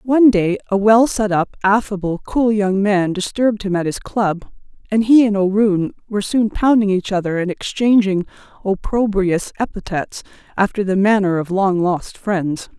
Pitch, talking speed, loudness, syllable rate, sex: 200 Hz, 165 wpm, -17 LUFS, 4.7 syllables/s, female